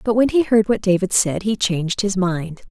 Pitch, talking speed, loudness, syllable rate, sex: 200 Hz, 245 wpm, -18 LUFS, 5.1 syllables/s, female